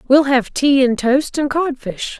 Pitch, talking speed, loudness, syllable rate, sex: 270 Hz, 190 wpm, -16 LUFS, 3.9 syllables/s, female